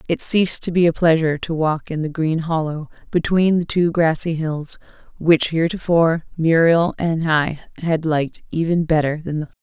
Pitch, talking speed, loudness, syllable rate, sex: 160 Hz, 180 wpm, -19 LUFS, 5.2 syllables/s, female